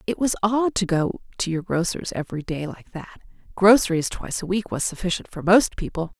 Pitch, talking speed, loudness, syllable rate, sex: 185 Hz, 205 wpm, -22 LUFS, 5.7 syllables/s, female